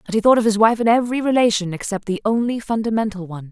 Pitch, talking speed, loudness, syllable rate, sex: 215 Hz, 240 wpm, -18 LUFS, 7.1 syllables/s, female